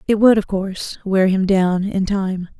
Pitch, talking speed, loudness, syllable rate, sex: 195 Hz, 210 wpm, -18 LUFS, 4.4 syllables/s, female